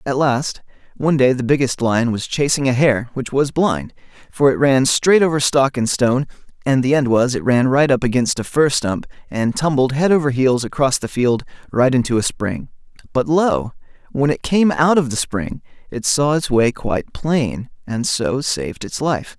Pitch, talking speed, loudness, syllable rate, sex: 130 Hz, 205 wpm, -17 LUFS, 4.8 syllables/s, male